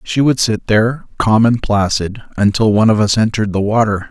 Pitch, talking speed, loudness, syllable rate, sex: 110 Hz, 205 wpm, -14 LUFS, 5.6 syllables/s, male